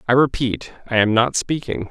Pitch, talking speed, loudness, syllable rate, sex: 120 Hz, 190 wpm, -19 LUFS, 5.0 syllables/s, male